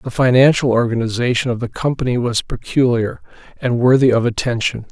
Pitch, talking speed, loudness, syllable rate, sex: 120 Hz, 145 wpm, -16 LUFS, 5.6 syllables/s, male